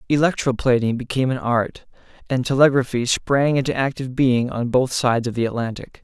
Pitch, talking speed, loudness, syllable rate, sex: 125 Hz, 160 wpm, -20 LUFS, 5.8 syllables/s, male